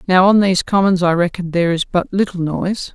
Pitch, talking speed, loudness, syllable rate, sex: 180 Hz, 225 wpm, -16 LUFS, 6.1 syllables/s, female